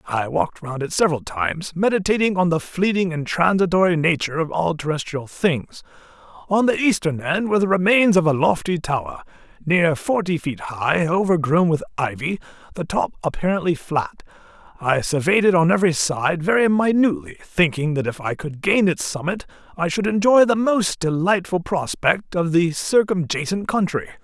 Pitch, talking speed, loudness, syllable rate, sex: 170 Hz, 165 wpm, -20 LUFS, 5.2 syllables/s, male